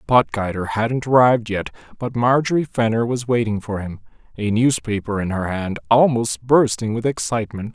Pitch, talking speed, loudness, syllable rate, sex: 115 Hz, 155 wpm, -19 LUFS, 5.1 syllables/s, male